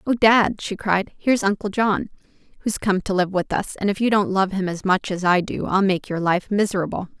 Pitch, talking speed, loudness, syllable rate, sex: 195 Hz, 250 wpm, -21 LUFS, 5.5 syllables/s, female